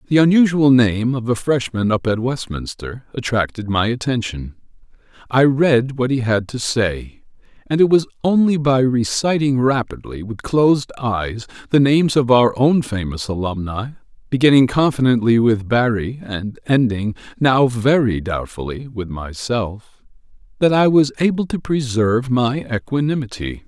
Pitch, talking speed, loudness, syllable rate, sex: 125 Hz, 140 wpm, -18 LUFS, 4.5 syllables/s, male